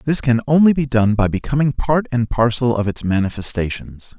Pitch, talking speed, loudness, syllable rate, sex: 125 Hz, 185 wpm, -17 LUFS, 5.3 syllables/s, male